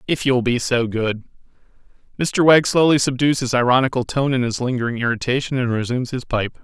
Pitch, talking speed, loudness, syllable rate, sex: 125 Hz, 180 wpm, -19 LUFS, 5.8 syllables/s, male